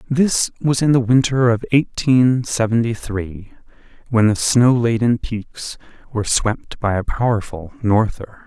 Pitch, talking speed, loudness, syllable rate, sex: 115 Hz, 140 wpm, -18 LUFS, 4.0 syllables/s, male